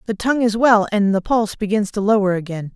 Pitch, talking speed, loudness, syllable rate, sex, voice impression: 210 Hz, 240 wpm, -18 LUFS, 6.3 syllables/s, female, feminine, adult-like, tensed, slightly bright, fluent, intellectual, slightly friendly, unique, slightly sharp